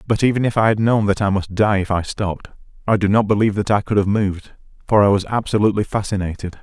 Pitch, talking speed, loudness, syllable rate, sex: 100 Hz, 245 wpm, -18 LUFS, 6.7 syllables/s, male